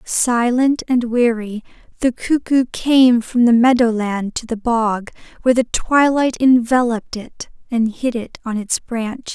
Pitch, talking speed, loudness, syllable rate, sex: 240 Hz, 155 wpm, -17 LUFS, 4.0 syllables/s, female